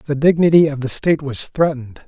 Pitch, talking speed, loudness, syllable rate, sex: 145 Hz, 200 wpm, -16 LUFS, 6.0 syllables/s, male